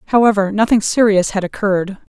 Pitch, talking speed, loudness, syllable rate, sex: 205 Hz, 140 wpm, -15 LUFS, 6.1 syllables/s, female